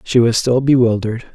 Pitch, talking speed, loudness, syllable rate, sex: 120 Hz, 180 wpm, -15 LUFS, 5.7 syllables/s, male